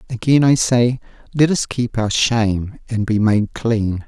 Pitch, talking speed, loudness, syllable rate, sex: 115 Hz, 175 wpm, -17 LUFS, 4.1 syllables/s, male